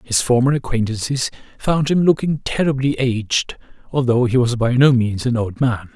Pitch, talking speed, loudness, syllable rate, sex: 125 Hz, 170 wpm, -18 LUFS, 4.9 syllables/s, male